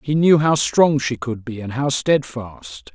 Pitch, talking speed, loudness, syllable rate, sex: 130 Hz, 205 wpm, -18 LUFS, 3.9 syllables/s, male